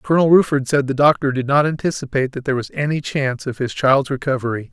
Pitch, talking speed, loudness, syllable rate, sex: 135 Hz, 215 wpm, -18 LUFS, 6.6 syllables/s, male